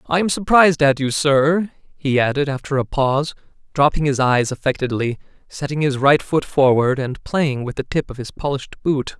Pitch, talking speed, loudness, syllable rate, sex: 140 Hz, 190 wpm, -18 LUFS, 5.1 syllables/s, male